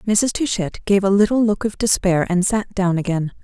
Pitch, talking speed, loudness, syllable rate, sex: 195 Hz, 210 wpm, -18 LUFS, 5.0 syllables/s, female